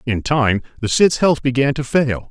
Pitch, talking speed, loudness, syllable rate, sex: 130 Hz, 210 wpm, -17 LUFS, 4.5 syllables/s, male